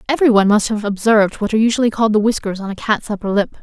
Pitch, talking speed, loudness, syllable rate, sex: 215 Hz, 265 wpm, -16 LUFS, 7.9 syllables/s, female